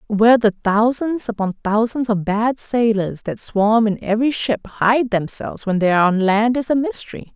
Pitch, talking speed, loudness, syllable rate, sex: 225 Hz, 190 wpm, -18 LUFS, 4.9 syllables/s, female